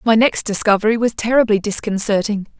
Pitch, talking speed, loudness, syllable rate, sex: 215 Hz, 140 wpm, -16 LUFS, 5.8 syllables/s, female